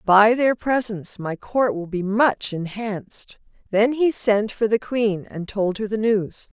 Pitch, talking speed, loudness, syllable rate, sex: 215 Hz, 180 wpm, -21 LUFS, 4.0 syllables/s, female